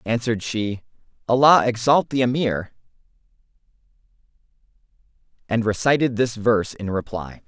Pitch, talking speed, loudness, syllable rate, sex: 115 Hz, 95 wpm, -21 LUFS, 5.0 syllables/s, male